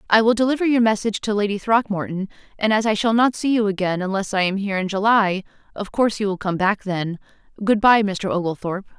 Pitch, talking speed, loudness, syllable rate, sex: 205 Hz, 205 wpm, -20 LUFS, 6.3 syllables/s, female